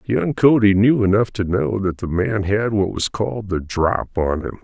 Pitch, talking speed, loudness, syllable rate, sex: 100 Hz, 220 wpm, -19 LUFS, 4.6 syllables/s, male